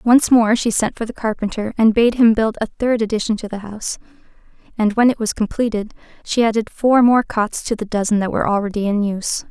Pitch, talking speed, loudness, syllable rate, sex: 220 Hz, 220 wpm, -18 LUFS, 5.8 syllables/s, female